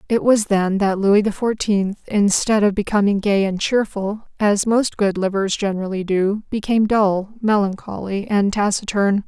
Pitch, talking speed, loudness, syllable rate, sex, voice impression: 205 Hz, 155 wpm, -19 LUFS, 4.6 syllables/s, female, very feminine, adult-like, slightly clear, slightly calm, slightly elegant, slightly kind